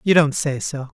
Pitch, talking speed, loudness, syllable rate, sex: 145 Hz, 240 wpm, -20 LUFS, 4.9 syllables/s, male